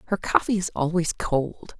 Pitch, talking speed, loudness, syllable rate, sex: 170 Hz, 165 wpm, -24 LUFS, 4.6 syllables/s, female